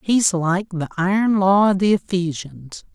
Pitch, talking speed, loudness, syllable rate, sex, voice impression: 185 Hz, 165 wpm, -18 LUFS, 4.1 syllables/s, female, feminine, adult-like, slightly soft, slightly sincere, very calm, slightly kind